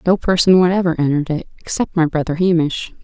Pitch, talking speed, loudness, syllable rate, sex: 170 Hz, 180 wpm, -16 LUFS, 6.2 syllables/s, female